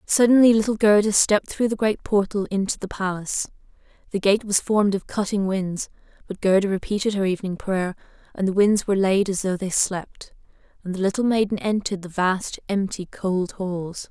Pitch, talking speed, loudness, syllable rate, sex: 195 Hz, 185 wpm, -22 LUFS, 5.4 syllables/s, female